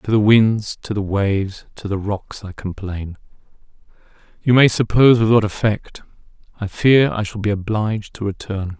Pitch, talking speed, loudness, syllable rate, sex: 105 Hz, 165 wpm, -18 LUFS, 4.9 syllables/s, male